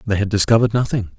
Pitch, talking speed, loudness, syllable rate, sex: 110 Hz, 200 wpm, -17 LUFS, 7.9 syllables/s, male